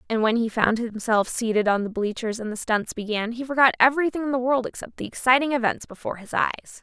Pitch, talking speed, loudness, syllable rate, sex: 235 Hz, 230 wpm, -23 LUFS, 6.3 syllables/s, female